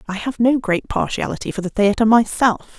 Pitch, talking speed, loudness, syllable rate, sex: 220 Hz, 195 wpm, -18 LUFS, 5.4 syllables/s, female